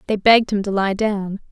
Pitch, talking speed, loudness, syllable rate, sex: 205 Hz, 235 wpm, -18 LUFS, 5.6 syllables/s, female